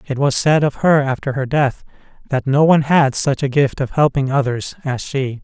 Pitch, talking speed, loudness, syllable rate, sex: 140 Hz, 220 wpm, -17 LUFS, 5.1 syllables/s, male